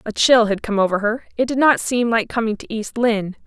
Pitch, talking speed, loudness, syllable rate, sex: 225 Hz, 260 wpm, -18 LUFS, 5.8 syllables/s, female